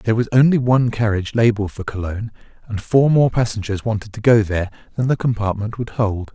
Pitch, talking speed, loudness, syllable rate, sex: 110 Hz, 200 wpm, -18 LUFS, 6.4 syllables/s, male